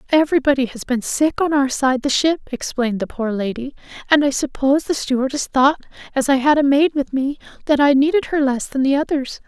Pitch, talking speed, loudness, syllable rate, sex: 275 Hz, 215 wpm, -18 LUFS, 5.8 syllables/s, female